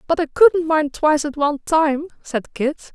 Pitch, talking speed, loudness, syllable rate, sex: 305 Hz, 205 wpm, -18 LUFS, 4.6 syllables/s, female